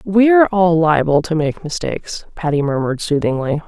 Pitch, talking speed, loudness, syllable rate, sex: 165 Hz, 145 wpm, -16 LUFS, 5.2 syllables/s, female